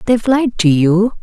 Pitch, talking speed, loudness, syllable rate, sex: 210 Hz, 195 wpm, -13 LUFS, 5.0 syllables/s, female